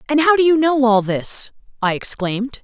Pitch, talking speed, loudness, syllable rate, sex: 250 Hz, 205 wpm, -17 LUFS, 5.1 syllables/s, female